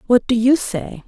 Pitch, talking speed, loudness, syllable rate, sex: 240 Hz, 220 wpm, -17 LUFS, 4.4 syllables/s, female